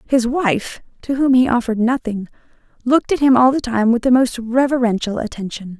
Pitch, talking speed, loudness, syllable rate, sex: 240 Hz, 185 wpm, -17 LUFS, 4.5 syllables/s, female